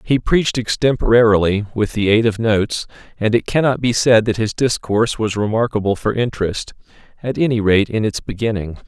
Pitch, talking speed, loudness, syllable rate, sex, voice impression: 110 Hz, 175 wpm, -17 LUFS, 5.5 syllables/s, male, masculine, adult-like, tensed, powerful, hard, clear, fluent, raspy, cool, intellectual, calm, slightly mature, friendly, reassuring, wild, lively, slightly kind